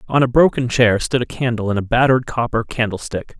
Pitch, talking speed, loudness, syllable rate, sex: 120 Hz, 210 wpm, -17 LUFS, 5.9 syllables/s, male